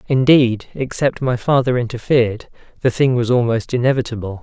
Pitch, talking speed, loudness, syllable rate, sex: 125 Hz, 135 wpm, -17 LUFS, 5.4 syllables/s, male